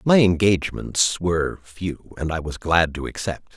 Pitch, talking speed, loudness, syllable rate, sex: 90 Hz, 170 wpm, -22 LUFS, 4.6 syllables/s, male